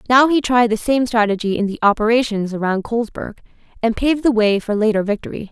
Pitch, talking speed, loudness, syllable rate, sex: 225 Hz, 185 wpm, -17 LUFS, 6.3 syllables/s, female